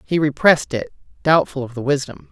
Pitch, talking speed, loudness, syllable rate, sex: 145 Hz, 180 wpm, -18 LUFS, 5.9 syllables/s, female